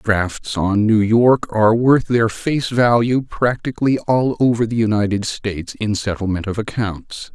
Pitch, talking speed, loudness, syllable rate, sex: 110 Hz, 155 wpm, -17 LUFS, 4.3 syllables/s, male